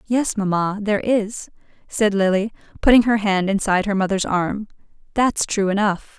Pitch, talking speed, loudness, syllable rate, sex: 205 Hz, 155 wpm, -20 LUFS, 4.7 syllables/s, female